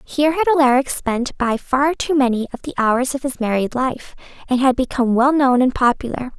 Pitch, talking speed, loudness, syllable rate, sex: 260 Hz, 205 wpm, -18 LUFS, 5.3 syllables/s, female